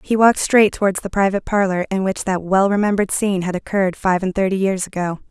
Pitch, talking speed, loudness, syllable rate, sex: 195 Hz, 225 wpm, -18 LUFS, 6.5 syllables/s, female